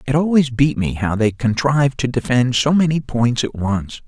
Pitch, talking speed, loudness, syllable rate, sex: 130 Hz, 205 wpm, -17 LUFS, 4.9 syllables/s, male